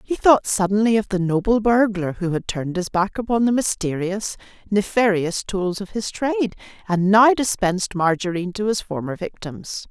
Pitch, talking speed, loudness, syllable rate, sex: 200 Hz, 170 wpm, -20 LUFS, 5.1 syllables/s, female